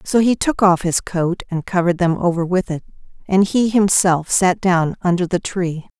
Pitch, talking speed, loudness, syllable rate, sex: 180 Hz, 200 wpm, -17 LUFS, 4.7 syllables/s, female